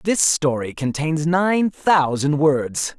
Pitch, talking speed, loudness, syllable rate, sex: 155 Hz, 120 wpm, -19 LUFS, 3.1 syllables/s, male